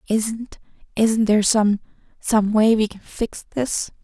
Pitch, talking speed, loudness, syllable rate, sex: 215 Hz, 120 wpm, -20 LUFS, 3.8 syllables/s, female